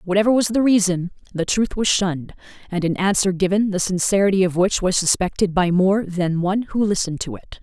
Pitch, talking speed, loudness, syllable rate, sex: 190 Hz, 205 wpm, -19 LUFS, 5.7 syllables/s, female